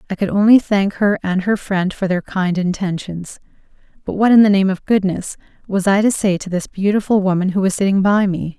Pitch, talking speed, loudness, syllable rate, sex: 195 Hz, 225 wpm, -16 LUFS, 5.4 syllables/s, female